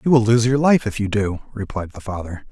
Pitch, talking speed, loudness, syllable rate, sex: 110 Hz, 260 wpm, -20 LUFS, 5.8 syllables/s, male